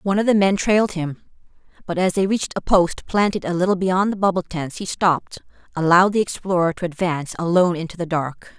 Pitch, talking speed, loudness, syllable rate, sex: 180 Hz, 210 wpm, -20 LUFS, 6.1 syllables/s, female